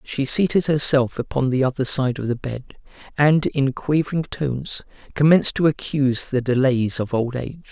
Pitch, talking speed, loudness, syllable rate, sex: 135 Hz, 170 wpm, -20 LUFS, 5.1 syllables/s, male